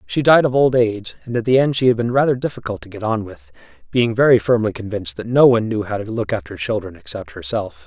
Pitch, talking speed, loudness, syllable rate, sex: 110 Hz, 250 wpm, -18 LUFS, 6.3 syllables/s, male